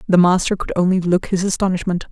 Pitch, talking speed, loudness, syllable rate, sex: 180 Hz, 200 wpm, -18 LUFS, 6.4 syllables/s, female